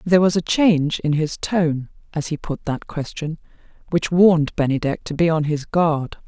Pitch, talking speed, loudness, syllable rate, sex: 160 Hz, 190 wpm, -20 LUFS, 4.9 syllables/s, female